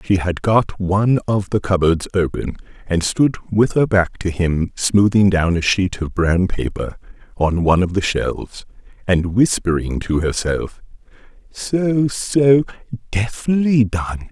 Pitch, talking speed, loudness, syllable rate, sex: 100 Hz, 145 wpm, -18 LUFS, 4.0 syllables/s, male